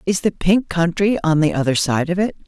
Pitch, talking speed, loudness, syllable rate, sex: 170 Hz, 245 wpm, -18 LUFS, 5.3 syllables/s, female